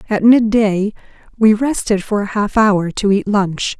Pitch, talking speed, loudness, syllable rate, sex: 210 Hz, 190 wpm, -15 LUFS, 4.1 syllables/s, female